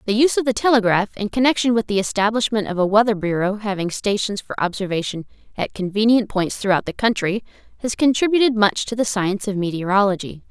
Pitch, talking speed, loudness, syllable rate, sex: 210 Hz, 185 wpm, -19 LUFS, 6.2 syllables/s, female